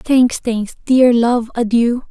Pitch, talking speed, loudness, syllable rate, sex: 240 Hz, 145 wpm, -15 LUFS, 3.1 syllables/s, female